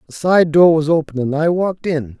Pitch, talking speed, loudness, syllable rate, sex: 160 Hz, 245 wpm, -15 LUFS, 5.4 syllables/s, male